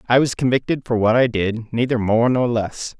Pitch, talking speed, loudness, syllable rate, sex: 120 Hz, 220 wpm, -19 LUFS, 5.2 syllables/s, male